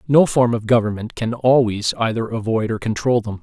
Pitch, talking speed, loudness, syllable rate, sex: 115 Hz, 195 wpm, -19 LUFS, 5.3 syllables/s, male